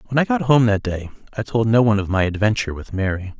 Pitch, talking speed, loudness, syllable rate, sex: 110 Hz, 265 wpm, -19 LUFS, 6.8 syllables/s, male